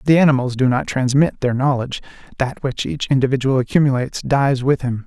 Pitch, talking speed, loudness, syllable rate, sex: 135 Hz, 180 wpm, -18 LUFS, 6.0 syllables/s, male